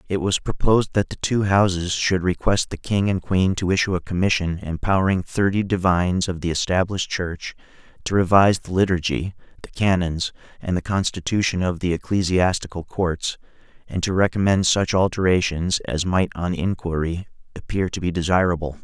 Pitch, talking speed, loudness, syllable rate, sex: 90 Hz, 160 wpm, -21 LUFS, 5.3 syllables/s, male